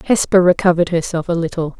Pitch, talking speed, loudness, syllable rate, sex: 170 Hz, 165 wpm, -16 LUFS, 6.6 syllables/s, female